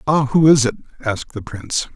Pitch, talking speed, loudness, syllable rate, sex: 130 Hz, 215 wpm, -17 LUFS, 6.1 syllables/s, male